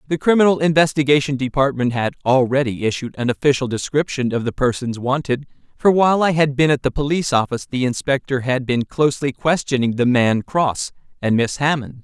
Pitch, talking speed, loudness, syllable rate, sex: 135 Hz, 175 wpm, -18 LUFS, 5.8 syllables/s, male